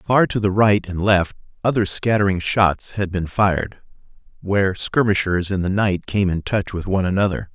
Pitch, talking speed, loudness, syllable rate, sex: 95 Hz, 185 wpm, -19 LUFS, 5.0 syllables/s, male